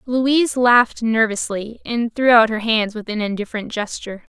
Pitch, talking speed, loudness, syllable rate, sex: 225 Hz, 165 wpm, -18 LUFS, 5.1 syllables/s, female